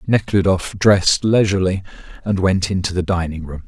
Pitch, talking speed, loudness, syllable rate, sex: 95 Hz, 145 wpm, -17 LUFS, 5.5 syllables/s, male